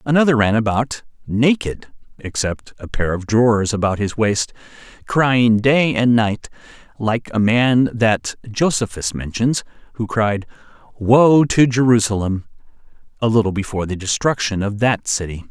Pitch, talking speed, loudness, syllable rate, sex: 115 Hz, 135 wpm, -18 LUFS, 4.4 syllables/s, male